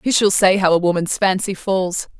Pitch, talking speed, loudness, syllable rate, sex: 190 Hz, 220 wpm, -17 LUFS, 5.0 syllables/s, female